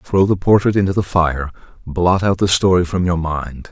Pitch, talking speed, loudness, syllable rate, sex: 90 Hz, 210 wpm, -16 LUFS, 4.9 syllables/s, male